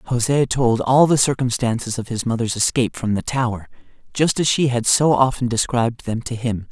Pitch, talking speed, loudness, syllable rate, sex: 120 Hz, 195 wpm, -19 LUFS, 5.1 syllables/s, male